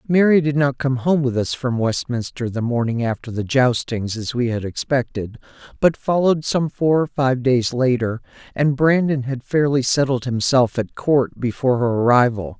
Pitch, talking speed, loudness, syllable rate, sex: 130 Hz, 175 wpm, -19 LUFS, 4.8 syllables/s, male